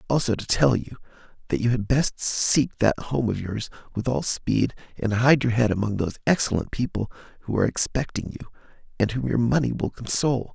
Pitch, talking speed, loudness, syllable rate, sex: 120 Hz, 195 wpm, -24 LUFS, 5.5 syllables/s, male